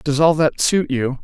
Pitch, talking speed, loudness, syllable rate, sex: 145 Hz, 245 wpm, -17 LUFS, 4.2 syllables/s, male